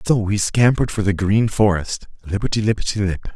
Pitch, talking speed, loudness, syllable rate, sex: 100 Hz, 180 wpm, -19 LUFS, 5.6 syllables/s, male